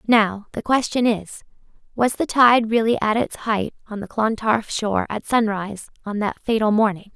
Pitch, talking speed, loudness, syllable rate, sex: 215 Hz, 175 wpm, -20 LUFS, 4.8 syllables/s, female